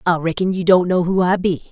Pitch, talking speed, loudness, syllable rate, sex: 180 Hz, 280 wpm, -17 LUFS, 5.9 syllables/s, female